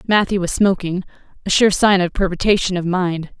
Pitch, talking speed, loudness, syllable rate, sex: 185 Hz, 160 wpm, -17 LUFS, 5.4 syllables/s, female